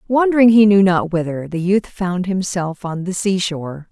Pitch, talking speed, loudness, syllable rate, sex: 185 Hz, 200 wpm, -17 LUFS, 4.8 syllables/s, female